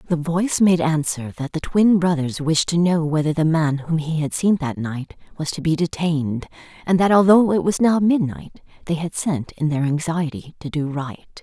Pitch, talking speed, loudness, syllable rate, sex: 160 Hz, 210 wpm, -20 LUFS, 4.9 syllables/s, female